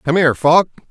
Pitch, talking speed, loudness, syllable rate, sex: 155 Hz, 200 wpm, -14 LUFS, 6.6 syllables/s, male